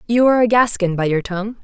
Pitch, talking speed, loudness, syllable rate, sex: 210 Hz, 255 wpm, -16 LUFS, 7.0 syllables/s, female